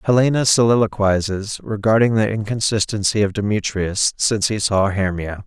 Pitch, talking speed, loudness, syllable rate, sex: 105 Hz, 120 wpm, -18 LUFS, 5.2 syllables/s, male